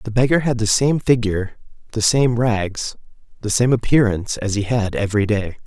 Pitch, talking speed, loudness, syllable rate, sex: 110 Hz, 180 wpm, -19 LUFS, 5.4 syllables/s, male